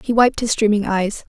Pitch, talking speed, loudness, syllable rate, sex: 215 Hz, 225 wpm, -18 LUFS, 5.1 syllables/s, female